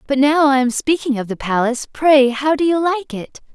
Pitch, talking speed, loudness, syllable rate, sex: 275 Hz, 235 wpm, -16 LUFS, 5.3 syllables/s, female